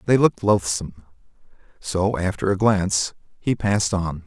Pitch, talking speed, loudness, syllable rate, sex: 95 Hz, 140 wpm, -21 LUFS, 5.1 syllables/s, male